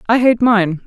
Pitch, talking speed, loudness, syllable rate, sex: 220 Hz, 210 wpm, -14 LUFS, 4.5 syllables/s, female